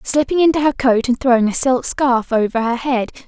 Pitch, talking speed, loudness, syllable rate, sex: 255 Hz, 220 wpm, -16 LUFS, 5.3 syllables/s, female